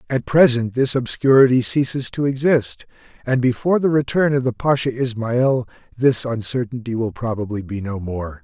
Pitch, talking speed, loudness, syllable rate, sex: 125 Hz, 155 wpm, -19 LUFS, 5.2 syllables/s, male